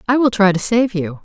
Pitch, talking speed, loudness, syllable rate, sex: 210 Hz, 290 wpm, -15 LUFS, 5.6 syllables/s, female